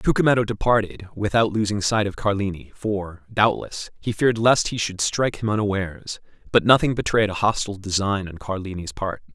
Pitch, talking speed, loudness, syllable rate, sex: 105 Hz, 165 wpm, -22 LUFS, 5.6 syllables/s, male